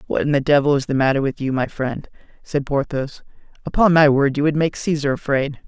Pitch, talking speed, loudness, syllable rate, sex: 140 Hz, 220 wpm, -19 LUFS, 5.7 syllables/s, male